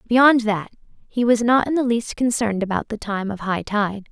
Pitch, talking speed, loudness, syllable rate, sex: 225 Hz, 220 wpm, -20 LUFS, 5.1 syllables/s, female